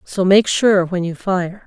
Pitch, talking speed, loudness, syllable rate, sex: 190 Hz, 215 wpm, -16 LUFS, 3.8 syllables/s, female